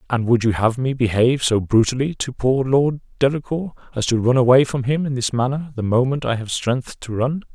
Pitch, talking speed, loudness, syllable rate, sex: 125 Hz, 225 wpm, -19 LUFS, 5.4 syllables/s, male